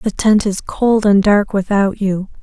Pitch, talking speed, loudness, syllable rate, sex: 205 Hz, 200 wpm, -15 LUFS, 3.9 syllables/s, female